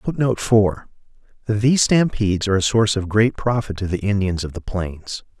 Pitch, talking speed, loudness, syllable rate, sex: 105 Hz, 180 wpm, -19 LUFS, 5.4 syllables/s, male